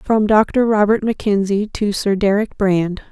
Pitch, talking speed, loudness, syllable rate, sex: 205 Hz, 155 wpm, -16 LUFS, 4.1 syllables/s, female